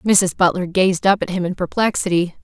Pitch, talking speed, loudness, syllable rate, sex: 185 Hz, 195 wpm, -18 LUFS, 5.1 syllables/s, female